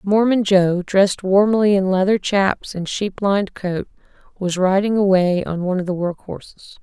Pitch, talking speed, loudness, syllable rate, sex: 195 Hz, 175 wpm, -18 LUFS, 4.7 syllables/s, female